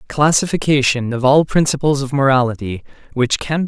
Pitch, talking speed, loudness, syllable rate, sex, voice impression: 135 Hz, 145 wpm, -16 LUFS, 5.5 syllables/s, male, masculine, adult-like, slightly bright, slightly clear, slightly cool, refreshing, friendly, slightly lively